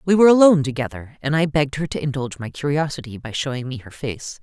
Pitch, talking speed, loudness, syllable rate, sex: 140 Hz, 230 wpm, -20 LUFS, 6.9 syllables/s, female